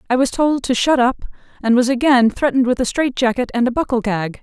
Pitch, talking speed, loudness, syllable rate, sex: 250 Hz, 230 wpm, -17 LUFS, 6.1 syllables/s, female